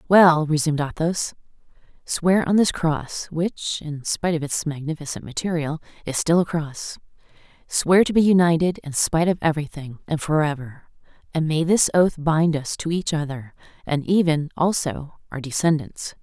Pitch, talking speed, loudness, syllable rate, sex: 160 Hz, 155 wpm, -22 LUFS, 4.9 syllables/s, female